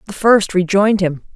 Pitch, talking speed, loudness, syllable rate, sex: 195 Hz, 175 wpm, -15 LUFS, 5.5 syllables/s, female